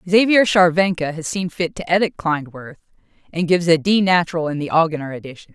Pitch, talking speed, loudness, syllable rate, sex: 170 Hz, 185 wpm, -18 LUFS, 5.9 syllables/s, female